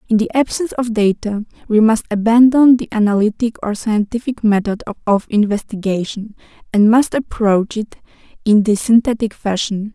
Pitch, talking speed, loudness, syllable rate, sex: 220 Hz, 140 wpm, -16 LUFS, 4.9 syllables/s, female